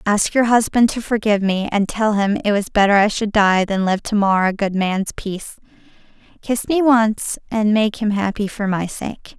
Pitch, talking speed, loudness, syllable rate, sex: 210 Hz, 210 wpm, -18 LUFS, 4.8 syllables/s, female